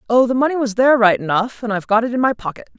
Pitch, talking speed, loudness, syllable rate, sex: 235 Hz, 300 wpm, -17 LUFS, 7.7 syllables/s, female